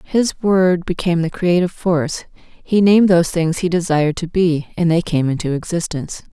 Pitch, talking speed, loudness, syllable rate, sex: 170 Hz, 180 wpm, -17 LUFS, 5.4 syllables/s, female